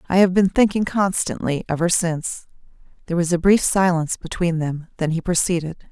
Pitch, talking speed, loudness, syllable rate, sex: 175 Hz, 175 wpm, -20 LUFS, 5.7 syllables/s, female